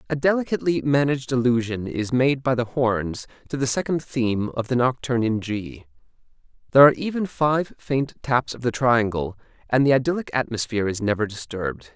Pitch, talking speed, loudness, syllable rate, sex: 125 Hz, 170 wpm, -22 LUFS, 5.6 syllables/s, male